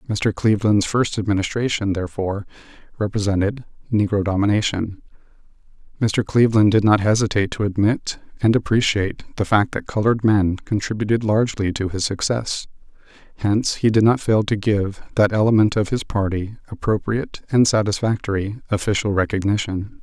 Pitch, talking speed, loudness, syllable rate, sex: 105 Hz, 130 wpm, -20 LUFS, 5.6 syllables/s, male